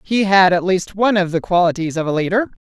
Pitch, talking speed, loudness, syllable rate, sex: 185 Hz, 245 wpm, -16 LUFS, 6.2 syllables/s, female